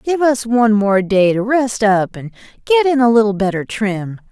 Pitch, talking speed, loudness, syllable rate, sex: 225 Hz, 210 wpm, -15 LUFS, 4.7 syllables/s, female